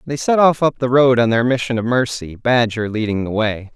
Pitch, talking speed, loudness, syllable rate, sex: 120 Hz, 240 wpm, -17 LUFS, 5.3 syllables/s, male